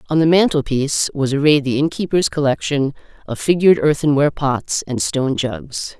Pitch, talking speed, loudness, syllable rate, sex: 145 Hz, 150 wpm, -17 LUFS, 5.4 syllables/s, female